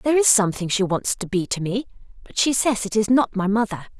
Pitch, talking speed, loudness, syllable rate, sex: 215 Hz, 255 wpm, -21 LUFS, 6.1 syllables/s, female